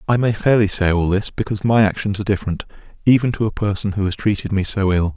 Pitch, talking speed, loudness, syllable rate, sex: 100 Hz, 245 wpm, -19 LUFS, 6.7 syllables/s, male